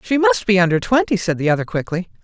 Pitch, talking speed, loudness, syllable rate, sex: 185 Hz, 240 wpm, -17 LUFS, 6.5 syllables/s, female